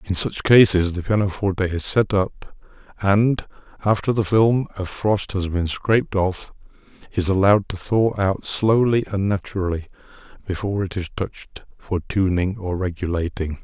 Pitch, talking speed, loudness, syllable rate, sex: 95 Hz, 150 wpm, -21 LUFS, 4.8 syllables/s, male